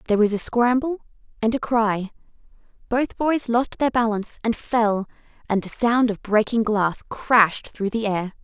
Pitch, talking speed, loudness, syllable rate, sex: 225 Hz, 170 wpm, -22 LUFS, 4.7 syllables/s, female